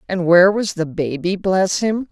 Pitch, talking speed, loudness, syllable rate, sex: 185 Hz, 200 wpm, -17 LUFS, 4.6 syllables/s, female